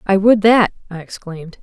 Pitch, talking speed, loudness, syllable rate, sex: 190 Hz, 185 wpm, -13 LUFS, 5.2 syllables/s, female